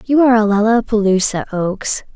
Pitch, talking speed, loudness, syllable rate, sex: 215 Hz, 140 wpm, -15 LUFS, 5.6 syllables/s, female